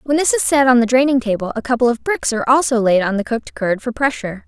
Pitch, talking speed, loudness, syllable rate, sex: 245 Hz, 280 wpm, -16 LUFS, 6.7 syllables/s, female